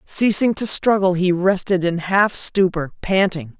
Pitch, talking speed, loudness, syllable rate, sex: 185 Hz, 150 wpm, -17 LUFS, 4.1 syllables/s, female